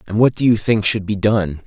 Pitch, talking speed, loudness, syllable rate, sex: 105 Hz, 290 wpm, -17 LUFS, 5.3 syllables/s, male